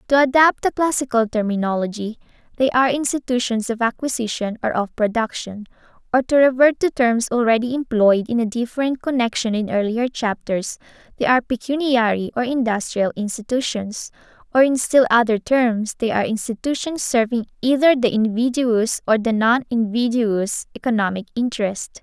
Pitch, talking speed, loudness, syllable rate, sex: 235 Hz, 140 wpm, -19 LUFS, 5.2 syllables/s, female